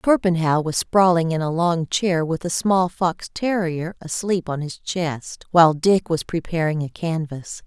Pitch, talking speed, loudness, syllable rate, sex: 170 Hz, 170 wpm, -21 LUFS, 4.1 syllables/s, female